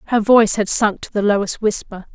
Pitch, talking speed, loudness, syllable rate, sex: 210 Hz, 225 wpm, -17 LUFS, 5.9 syllables/s, female